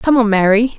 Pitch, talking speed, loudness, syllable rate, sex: 225 Hz, 230 wpm, -13 LUFS, 5.3 syllables/s, female